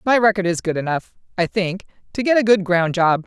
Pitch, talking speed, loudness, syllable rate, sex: 190 Hz, 240 wpm, -19 LUFS, 5.6 syllables/s, female